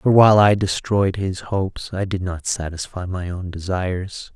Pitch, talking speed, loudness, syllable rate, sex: 95 Hz, 180 wpm, -20 LUFS, 4.6 syllables/s, male